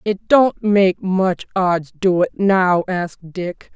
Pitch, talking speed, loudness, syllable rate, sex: 185 Hz, 160 wpm, -17 LUFS, 3.2 syllables/s, female